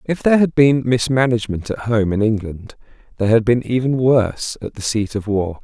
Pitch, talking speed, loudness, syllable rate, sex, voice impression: 115 Hz, 200 wpm, -17 LUFS, 5.6 syllables/s, male, very masculine, middle-aged, very thick, slightly relaxed, slightly weak, dark, soft, slightly muffled, slightly fluent, slightly raspy, cool, intellectual, slightly refreshing, very sincere, very calm, very mature, friendly, very reassuring, very unique, elegant, slightly wild, sweet, slightly lively, very kind, modest